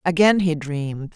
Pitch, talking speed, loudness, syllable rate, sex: 165 Hz, 155 wpm, -20 LUFS, 4.8 syllables/s, female